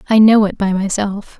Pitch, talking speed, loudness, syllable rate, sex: 205 Hz, 215 wpm, -14 LUFS, 5.0 syllables/s, female